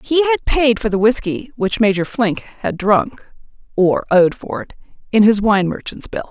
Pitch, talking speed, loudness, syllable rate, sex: 220 Hz, 190 wpm, -16 LUFS, 4.1 syllables/s, female